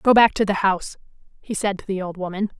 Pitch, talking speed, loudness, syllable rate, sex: 200 Hz, 255 wpm, -21 LUFS, 6.3 syllables/s, female